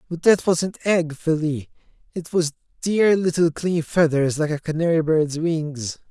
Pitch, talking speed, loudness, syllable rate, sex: 160 Hz, 145 wpm, -21 LUFS, 4.2 syllables/s, male